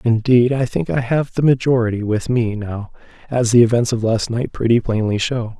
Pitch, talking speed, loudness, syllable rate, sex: 115 Hz, 205 wpm, -17 LUFS, 5.1 syllables/s, male